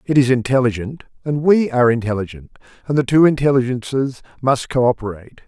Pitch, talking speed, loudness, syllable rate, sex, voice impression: 130 Hz, 140 wpm, -17 LUFS, 6.1 syllables/s, male, masculine, adult-like, powerful, bright, clear, slightly raspy, intellectual, calm, friendly, reassuring, wild, lively, kind, light